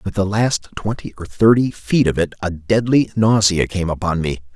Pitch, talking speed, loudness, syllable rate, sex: 100 Hz, 200 wpm, -18 LUFS, 4.9 syllables/s, male